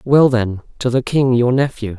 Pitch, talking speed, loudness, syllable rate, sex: 125 Hz, 210 wpm, -16 LUFS, 4.6 syllables/s, male